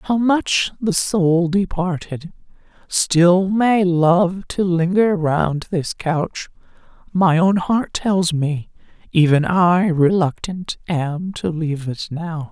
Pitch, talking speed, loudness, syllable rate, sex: 175 Hz, 125 wpm, -18 LUFS, 3.1 syllables/s, female